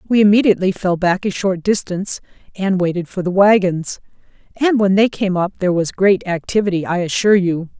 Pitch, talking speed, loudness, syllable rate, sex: 190 Hz, 185 wpm, -16 LUFS, 5.7 syllables/s, female